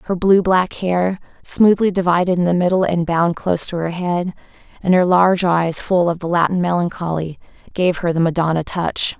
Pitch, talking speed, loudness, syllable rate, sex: 175 Hz, 190 wpm, -17 LUFS, 5.1 syllables/s, female